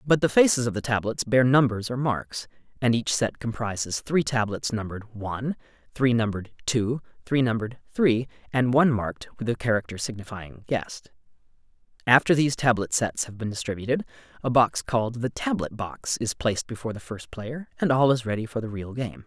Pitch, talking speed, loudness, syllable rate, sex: 120 Hz, 185 wpm, -25 LUFS, 5.6 syllables/s, male